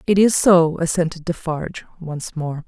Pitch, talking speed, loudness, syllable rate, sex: 165 Hz, 155 wpm, -19 LUFS, 4.6 syllables/s, female